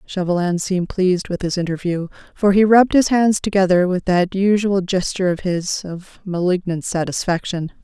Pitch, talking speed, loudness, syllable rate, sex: 185 Hz, 160 wpm, -18 LUFS, 5.2 syllables/s, female